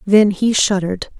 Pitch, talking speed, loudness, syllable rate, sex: 200 Hz, 150 wpm, -16 LUFS, 4.9 syllables/s, female